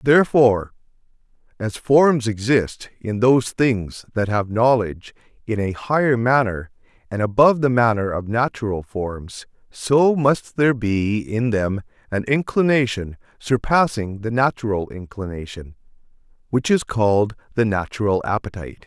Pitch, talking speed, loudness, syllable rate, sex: 115 Hz, 125 wpm, -20 LUFS, 4.6 syllables/s, male